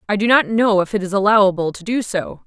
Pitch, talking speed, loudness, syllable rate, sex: 205 Hz, 270 wpm, -17 LUFS, 6.2 syllables/s, female